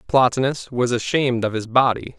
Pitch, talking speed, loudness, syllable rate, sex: 125 Hz, 165 wpm, -20 LUFS, 5.4 syllables/s, male